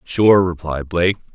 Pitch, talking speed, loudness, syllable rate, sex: 85 Hz, 135 wpm, -17 LUFS, 4.6 syllables/s, male